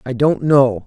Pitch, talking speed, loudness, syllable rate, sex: 130 Hz, 210 wpm, -15 LUFS, 3.9 syllables/s, male